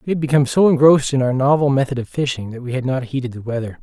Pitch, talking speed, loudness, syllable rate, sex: 130 Hz, 280 wpm, -17 LUFS, 7.3 syllables/s, male